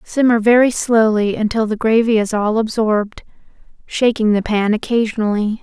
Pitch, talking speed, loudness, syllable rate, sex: 220 Hz, 140 wpm, -16 LUFS, 5.1 syllables/s, female